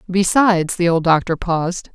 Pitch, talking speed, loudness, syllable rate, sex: 180 Hz, 155 wpm, -17 LUFS, 5.1 syllables/s, female